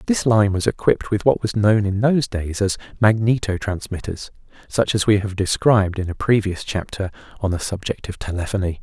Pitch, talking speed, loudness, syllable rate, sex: 100 Hz, 190 wpm, -20 LUFS, 5.5 syllables/s, male